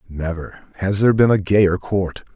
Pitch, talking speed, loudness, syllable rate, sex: 95 Hz, 180 wpm, -18 LUFS, 4.6 syllables/s, male